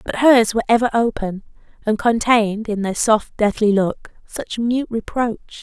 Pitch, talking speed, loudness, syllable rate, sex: 220 Hz, 160 wpm, -18 LUFS, 4.5 syllables/s, female